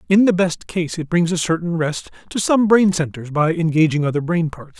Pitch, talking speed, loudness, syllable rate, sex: 170 Hz, 225 wpm, -18 LUFS, 5.2 syllables/s, male